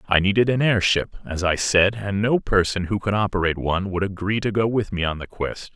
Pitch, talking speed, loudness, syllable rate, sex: 100 Hz, 240 wpm, -21 LUFS, 5.6 syllables/s, male